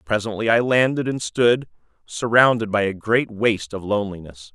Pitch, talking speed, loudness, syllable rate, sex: 110 Hz, 160 wpm, -20 LUFS, 5.2 syllables/s, male